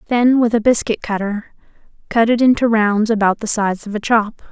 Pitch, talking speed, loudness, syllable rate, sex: 220 Hz, 200 wpm, -16 LUFS, 5.1 syllables/s, female